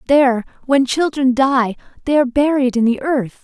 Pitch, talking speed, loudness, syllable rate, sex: 265 Hz, 175 wpm, -16 LUFS, 5.1 syllables/s, female